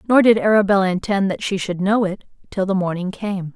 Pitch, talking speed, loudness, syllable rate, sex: 195 Hz, 220 wpm, -19 LUFS, 5.8 syllables/s, female